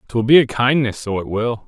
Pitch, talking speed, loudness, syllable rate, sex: 120 Hz, 250 wpm, -17 LUFS, 5.3 syllables/s, male